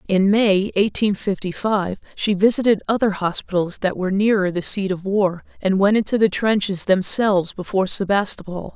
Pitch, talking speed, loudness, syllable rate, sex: 195 Hz, 165 wpm, -19 LUFS, 5.1 syllables/s, female